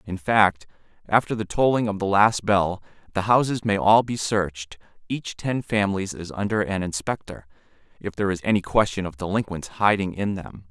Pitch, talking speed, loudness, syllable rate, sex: 100 Hz, 170 wpm, -23 LUFS, 5.2 syllables/s, male